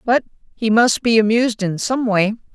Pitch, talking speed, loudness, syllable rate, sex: 225 Hz, 190 wpm, -17 LUFS, 5.1 syllables/s, female